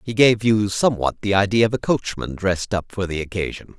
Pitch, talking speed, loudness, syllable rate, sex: 100 Hz, 220 wpm, -20 LUFS, 5.8 syllables/s, male